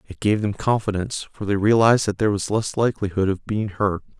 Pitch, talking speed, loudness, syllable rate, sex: 105 Hz, 215 wpm, -21 LUFS, 6.2 syllables/s, male